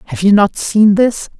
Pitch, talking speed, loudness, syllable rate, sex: 210 Hz, 215 wpm, -12 LUFS, 4.6 syllables/s, female